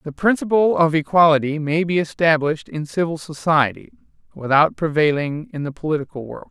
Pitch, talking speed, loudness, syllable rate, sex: 160 Hz, 150 wpm, -19 LUFS, 5.5 syllables/s, male